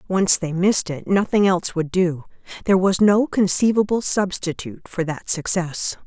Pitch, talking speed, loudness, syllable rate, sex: 185 Hz, 160 wpm, -20 LUFS, 5.0 syllables/s, female